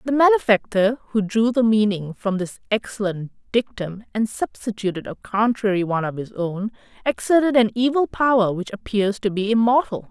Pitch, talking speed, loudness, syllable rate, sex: 215 Hz, 160 wpm, -21 LUFS, 5.2 syllables/s, female